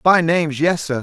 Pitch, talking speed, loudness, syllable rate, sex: 160 Hz, 235 wpm, -17 LUFS, 5.4 syllables/s, male